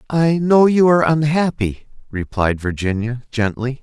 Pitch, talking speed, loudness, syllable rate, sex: 135 Hz, 125 wpm, -17 LUFS, 4.5 syllables/s, male